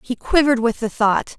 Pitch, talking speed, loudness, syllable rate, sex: 240 Hz, 215 wpm, -18 LUFS, 5.5 syllables/s, female